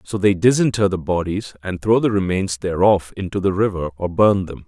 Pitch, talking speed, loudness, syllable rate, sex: 95 Hz, 205 wpm, -19 LUFS, 5.2 syllables/s, male